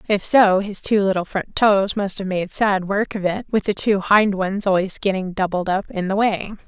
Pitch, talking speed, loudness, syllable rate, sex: 195 Hz, 235 wpm, -19 LUFS, 4.8 syllables/s, female